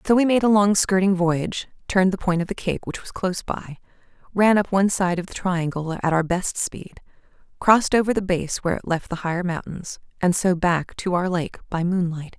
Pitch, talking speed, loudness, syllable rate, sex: 185 Hz, 225 wpm, -22 LUFS, 5.5 syllables/s, female